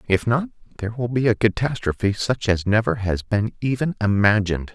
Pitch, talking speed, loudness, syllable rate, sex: 110 Hz, 175 wpm, -21 LUFS, 5.6 syllables/s, male